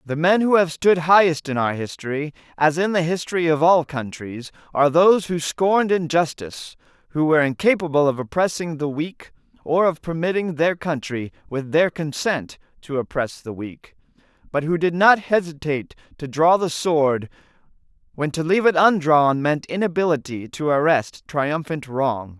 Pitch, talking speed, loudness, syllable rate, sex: 155 Hz, 160 wpm, -20 LUFS, 4.9 syllables/s, male